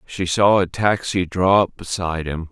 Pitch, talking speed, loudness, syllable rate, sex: 90 Hz, 190 wpm, -19 LUFS, 4.6 syllables/s, male